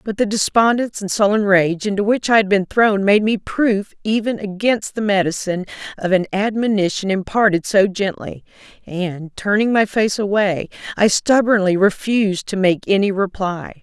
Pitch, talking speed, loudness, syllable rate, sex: 200 Hz, 160 wpm, -17 LUFS, 4.9 syllables/s, female